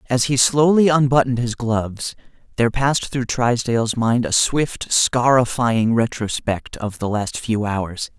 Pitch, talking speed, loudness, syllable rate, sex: 120 Hz, 145 wpm, -19 LUFS, 4.4 syllables/s, male